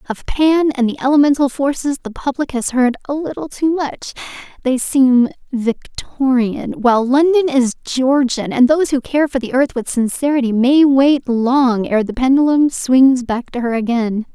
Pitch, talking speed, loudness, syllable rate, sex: 265 Hz, 165 wpm, -15 LUFS, 4.6 syllables/s, female